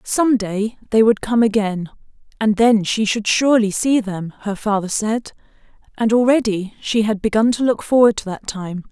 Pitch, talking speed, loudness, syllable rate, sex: 215 Hz, 180 wpm, -18 LUFS, 4.8 syllables/s, female